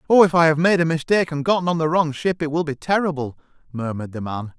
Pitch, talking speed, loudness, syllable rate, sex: 155 Hz, 260 wpm, -20 LUFS, 6.7 syllables/s, male